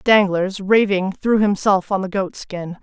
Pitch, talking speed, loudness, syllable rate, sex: 195 Hz, 170 wpm, -18 LUFS, 4.0 syllables/s, female